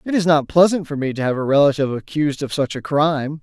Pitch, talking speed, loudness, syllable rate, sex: 150 Hz, 265 wpm, -18 LUFS, 6.6 syllables/s, male